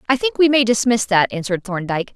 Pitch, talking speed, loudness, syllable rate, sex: 220 Hz, 225 wpm, -17 LUFS, 6.6 syllables/s, female